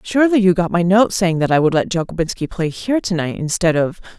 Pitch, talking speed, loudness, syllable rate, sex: 180 Hz, 245 wpm, -17 LUFS, 6.1 syllables/s, female